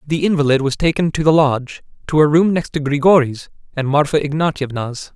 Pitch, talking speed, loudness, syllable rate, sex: 150 Hz, 185 wpm, -16 LUFS, 5.7 syllables/s, male